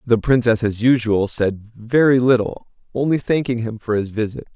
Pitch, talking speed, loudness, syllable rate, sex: 115 Hz, 170 wpm, -18 LUFS, 4.9 syllables/s, male